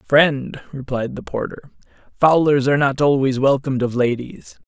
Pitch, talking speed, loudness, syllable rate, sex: 135 Hz, 140 wpm, -18 LUFS, 5.2 syllables/s, male